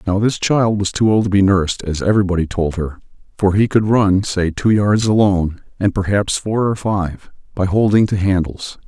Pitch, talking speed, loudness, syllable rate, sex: 100 Hz, 205 wpm, -16 LUFS, 5.1 syllables/s, male